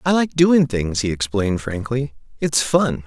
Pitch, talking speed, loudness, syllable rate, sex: 120 Hz, 175 wpm, -19 LUFS, 4.4 syllables/s, male